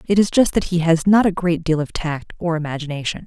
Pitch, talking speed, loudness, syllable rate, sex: 165 Hz, 255 wpm, -19 LUFS, 5.9 syllables/s, female